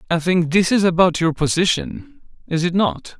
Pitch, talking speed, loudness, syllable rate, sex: 180 Hz, 190 wpm, -18 LUFS, 4.8 syllables/s, male